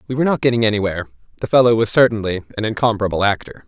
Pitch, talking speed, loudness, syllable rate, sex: 110 Hz, 195 wpm, -17 LUFS, 8.3 syllables/s, male